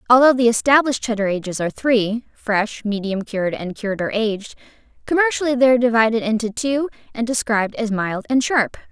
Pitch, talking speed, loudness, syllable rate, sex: 230 Hz, 175 wpm, -19 LUFS, 6.0 syllables/s, female